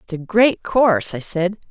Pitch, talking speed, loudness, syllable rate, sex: 195 Hz, 210 wpm, -18 LUFS, 4.7 syllables/s, female